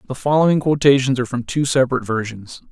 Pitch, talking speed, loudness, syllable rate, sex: 130 Hz, 175 wpm, -17 LUFS, 6.9 syllables/s, male